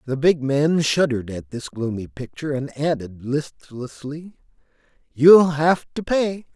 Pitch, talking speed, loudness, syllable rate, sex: 145 Hz, 135 wpm, -20 LUFS, 4.1 syllables/s, male